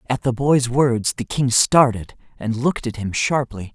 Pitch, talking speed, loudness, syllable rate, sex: 125 Hz, 190 wpm, -19 LUFS, 4.4 syllables/s, male